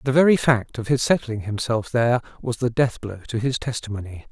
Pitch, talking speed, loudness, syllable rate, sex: 120 Hz, 210 wpm, -22 LUFS, 5.6 syllables/s, male